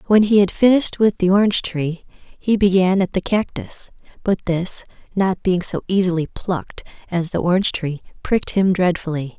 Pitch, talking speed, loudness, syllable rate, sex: 185 Hz, 175 wpm, -19 LUFS, 5.1 syllables/s, female